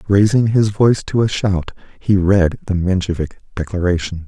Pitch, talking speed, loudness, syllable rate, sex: 95 Hz, 155 wpm, -17 LUFS, 5.0 syllables/s, male